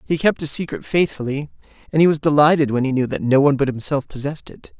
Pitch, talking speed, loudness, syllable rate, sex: 145 Hz, 240 wpm, -19 LUFS, 6.7 syllables/s, male